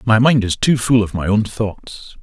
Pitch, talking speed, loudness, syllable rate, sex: 110 Hz, 245 wpm, -16 LUFS, 4.3 syllables/s, male